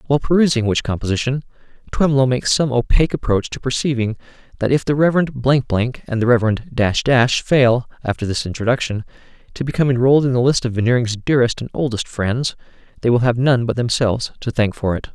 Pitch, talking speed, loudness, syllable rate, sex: 125 Hz, 190 wpm, -18 LUFS, 6.3 syllables/s, male